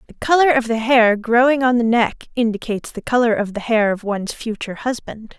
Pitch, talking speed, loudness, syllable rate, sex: 230 Hz, 210 wpm, -18 LUFS, 5.7 syllables/s, female